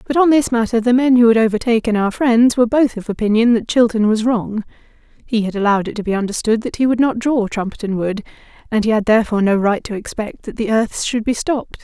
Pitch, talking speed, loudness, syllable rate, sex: 225 Hz, 240 wpm, -16 LUFS, 6.2 syllables/s, female